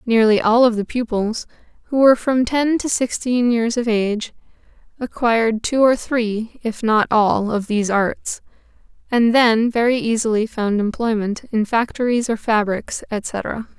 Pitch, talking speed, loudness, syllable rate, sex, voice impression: 230 Hz, 150 wpm, -18 LUFS, 4.4 syllables/s, female, very feminine, adult-like, slightly intellectual